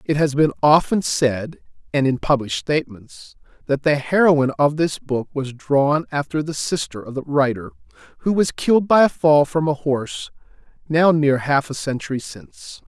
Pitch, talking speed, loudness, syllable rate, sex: 140 Hz, 175 wpm, -19 LUFS, 4.9 syllables/s, male